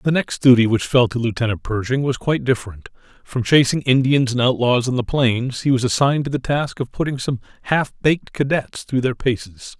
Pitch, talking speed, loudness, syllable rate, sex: 125 Hz, 210 wpm, -19 LUFS, 5.5 syllables/s, male